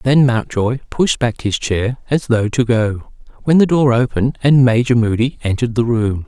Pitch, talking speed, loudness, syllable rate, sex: 120 Hz, 190 wpm, -16 LUFS, 4.8 syllables/s, male